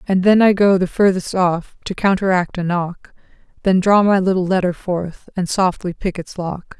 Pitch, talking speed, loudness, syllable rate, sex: 185 Hz, 195 wpm, -17 LUFS, 4.7 syllables/s, female